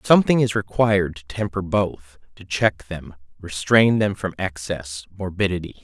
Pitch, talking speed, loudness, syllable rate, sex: 95 Hz, 135 wpm, -21 LUFS, 4.6 syllables/s, male